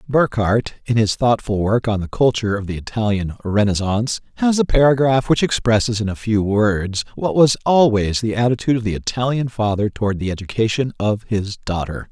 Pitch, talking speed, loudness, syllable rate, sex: 110 Hz, 180 wpm, -18 LUFS, 5.4 syllables/s, male